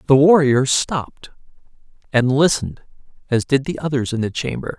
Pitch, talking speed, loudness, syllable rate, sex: 140 Hz, 150 wpm, -18 LUFS, 5.4 syllables/s, male